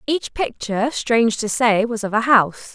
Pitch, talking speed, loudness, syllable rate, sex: 230 Hz, 195 wpm, -19 LUFS, 5.1 syllables/s, female